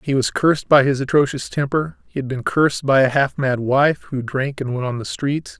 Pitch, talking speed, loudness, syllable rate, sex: 135 Hz, 245 wpm, -19 LUFS, 5.2 syllables/s, male